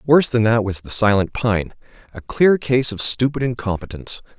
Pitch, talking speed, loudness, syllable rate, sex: 115 Hz, 165 wpm, -19 LUFS, 5.4 syllables/s, male